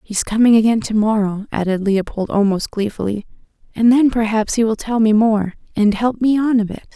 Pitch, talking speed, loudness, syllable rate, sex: 220 Hz, 200 wpm, -17 LUFS, 5.3 syllables/s, female